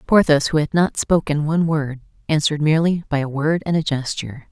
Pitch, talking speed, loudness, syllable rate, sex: 155 Hz, 200 wpm, -19 LUFS, 6.0 syllables/s, female